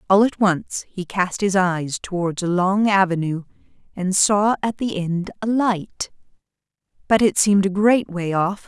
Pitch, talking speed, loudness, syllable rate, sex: 190 Hz, 175 wpm, -20 LUFS, 4.3 syllables/s, female